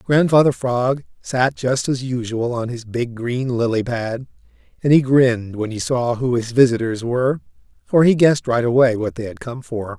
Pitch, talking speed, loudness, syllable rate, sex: 120 Hz, 190 wpm, -19 LUFS, 4.7 syllables/s, male